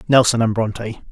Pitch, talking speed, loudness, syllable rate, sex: 115 Hz, 160 wpm, -17 LUFS, 5.6 syllables/s, male